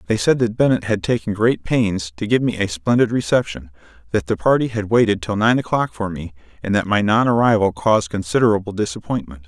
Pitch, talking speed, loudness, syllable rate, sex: 105 Hz, 205 wpm, -19 LUFS, 5.8 syllables/s, male